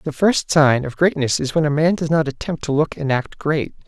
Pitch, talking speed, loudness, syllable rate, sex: 150 Hz, 265 wpm, -19 LUFS, 5.2 syllables/s, male